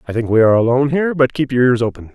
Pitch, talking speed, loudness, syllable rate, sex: 130 Hz, 305 wpm, -15 LUFS, 8.0 syllables/s, male